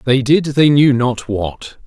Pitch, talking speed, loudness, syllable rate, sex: 130 Hz, 195 wpm, -14 LUFS, 3.3 syllables/s, male